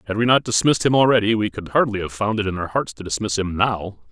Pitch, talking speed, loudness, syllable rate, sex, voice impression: 105 Hz, 275 wpm, -20 LUFS, 6.4 syllables/s, male, masculine, adult-like, slightly tensed, clear, fluent, slightly cool, intellectual, slightly refreshing, sincere, calm, mature, slightly wild, kind